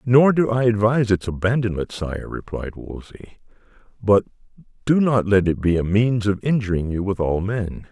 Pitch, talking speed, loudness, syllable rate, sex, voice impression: 105 Hz, 175 wpm, -20 LUFS, 5.0 syllables/s, male, very masculine, old, very thick, slightly tensed, very powerful, slightly bright, very soft, very muffled, fluent, raspy, very cool, intellectual, slightly refreshing, sincere, calm, very mature, friendly, reassuring, very unique, elegant, very wild, slightly sweet, lively, very kind, slightly modest